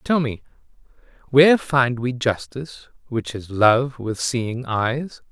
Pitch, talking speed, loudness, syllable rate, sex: 125 Hz, 135 wpm, -20 LUFS, 3.7 syllables/s, male